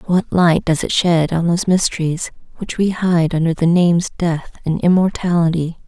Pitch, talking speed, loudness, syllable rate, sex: 170 Hz, 175 wpm, -16 LUFS, 5.0 syllables/s, female